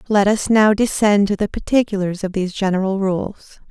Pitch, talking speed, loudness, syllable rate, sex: 200 Hz, 180 wpm, -18 LUFS, 5.3 syllables/s, female